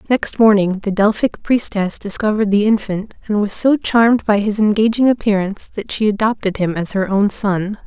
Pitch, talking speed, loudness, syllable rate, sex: 210 Hz, 185 wpm, -16 LUFS, 5.1 syllables/s, female